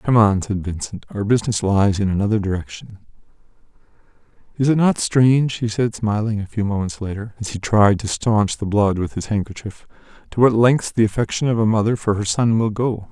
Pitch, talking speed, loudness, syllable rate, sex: 105 Hz, 200 wpm, -19 LUFS, 5.5 syllables/s, male